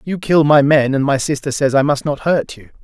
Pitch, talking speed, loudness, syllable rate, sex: 145 Hz, 275 wpm, -15 LUFS, 5.3 syllables/s, male